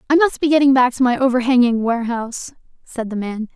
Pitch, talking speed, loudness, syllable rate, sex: 250 Hz, 200 wpm, -17 LUFS, 6.3 syllables/s, female